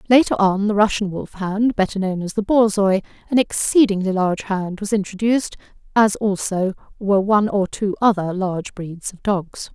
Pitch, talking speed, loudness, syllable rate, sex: 200 Hz, 165 wpm, -19 LUFS, 5.2 syllables/s, female